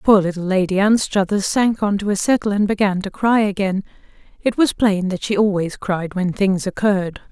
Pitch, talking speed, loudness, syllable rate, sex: 200 Hz, 195 wpm, -18 LUFS, 5.2 syllables/s, female